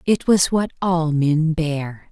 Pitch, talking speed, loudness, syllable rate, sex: 160 Hz, 170 wpm, -19 LUFS, 3.2 syllables/s, female